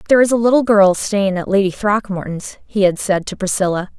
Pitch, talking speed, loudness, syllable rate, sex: 200 Hz, 210 wpm, -16 LUFS, 5.7 syllables/s, female